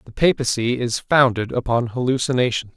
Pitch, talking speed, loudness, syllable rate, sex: 125 Hz, 130 wpm, -20 LUFS, 5.4 syllables/s, male